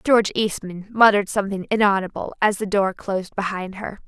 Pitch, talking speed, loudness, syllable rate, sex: 200 Hz, 160 wpm, -21 LUFS, 5.9 syllables/s, female